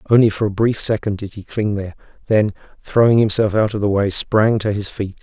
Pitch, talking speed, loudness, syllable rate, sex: 105 Hz, 230 wpm, -17 LUFS, 5.8 syllables/s, male